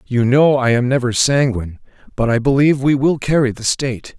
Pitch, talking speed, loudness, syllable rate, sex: 130 Hz, 200 wpm, -16 LUFS, 5.7 syllables/s, male